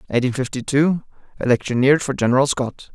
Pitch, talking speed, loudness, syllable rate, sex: 130 Hz, 120 wpm, -19 LUFS, 6.4 syllables/s, male